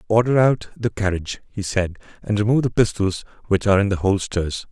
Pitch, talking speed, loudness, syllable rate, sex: 100 Hz, 190 wpm, -21 LUFS, 5.9 syllables/s, male